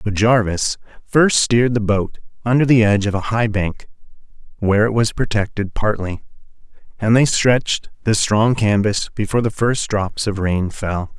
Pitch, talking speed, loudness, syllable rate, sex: 110 Hz, 165 wpm, -18 LUFS, 4.8 syllables/s, male